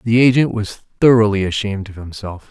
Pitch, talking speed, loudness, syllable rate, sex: 105 Hz, 170 wpm, -16 LUFS, 5.7 syllables/s, male